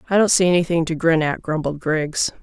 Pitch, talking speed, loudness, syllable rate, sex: 165 Hz, 225 wpm, -19 LUFS, 5.6 syllables/s, female